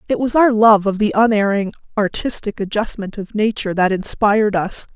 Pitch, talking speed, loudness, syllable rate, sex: 210 Hz, 170 wpm, -17 LUFS, 5.4 syllables/s, female